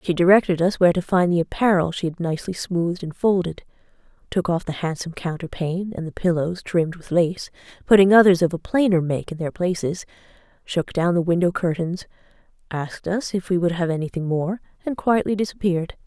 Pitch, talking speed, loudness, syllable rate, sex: 175 Hz, 185 wpm, -21 LUFS, 5.9 syllables/s, female